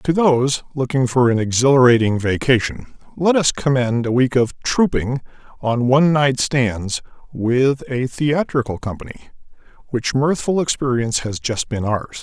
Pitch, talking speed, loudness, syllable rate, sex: 130 Hz, 140 wpm, -18 LUFS, 4.7 syllables/s, male